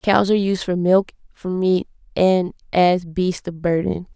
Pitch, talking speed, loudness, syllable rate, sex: 180 Hz, 175 wpm, -19 LUFS, 4.1 syllables/s, female